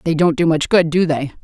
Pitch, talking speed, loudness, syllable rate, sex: 160 Hz, 250 wpm, -16 LUFS, 5.7 syllables/s, female